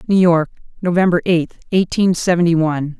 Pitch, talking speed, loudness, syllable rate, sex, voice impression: 170 Hz, 140 wpm, -16 LUFS, 5.5 syllables/s, female, feminine, adult-like, tensed, powerful, clear, fluent, intellectual, unique, lively, intense